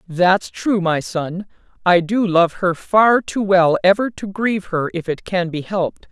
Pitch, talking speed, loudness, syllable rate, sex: 185 Hz, 195 wpm, -18 LUFS, 4.2 syllables/s, female